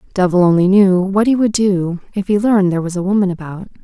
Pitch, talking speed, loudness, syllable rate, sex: 190 Hz, 235 wpm, -14 LUFS, 6.4 syllables/s, female